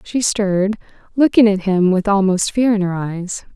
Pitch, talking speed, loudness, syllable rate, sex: 200 Hz, 185 wpm, -16 LUFS, 4.7 syllables/s, female